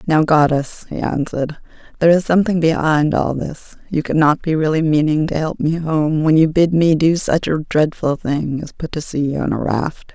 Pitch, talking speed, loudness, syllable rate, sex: 155 Hz, 205 wpm, -17 LUFS, 4.9 syllables/s, female